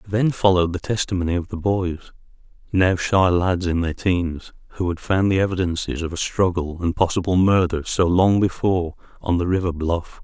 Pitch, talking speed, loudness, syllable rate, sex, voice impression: 90 Hz, 175 wpm, -21 LUFS, 5.1 syllables/s, male, masculine, adult-like, thick, slightly weak, clear, cool, sincere, calm, reassuring, slightly wild, kind, modest